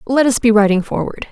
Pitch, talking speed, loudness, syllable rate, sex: 230 Hz, 230 wpm, -15 LUFS, 5.9 syllables/s, female